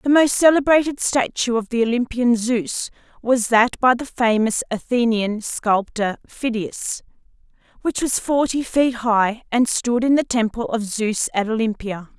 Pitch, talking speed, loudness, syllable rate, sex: 235 Hz, 150 wpm, -20 LUFS, 4.2 syllables/s, female